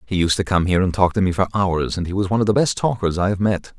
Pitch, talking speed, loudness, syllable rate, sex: 95 Hz, 350 wpm, -19 LUFS, 7.0 syllables/s, male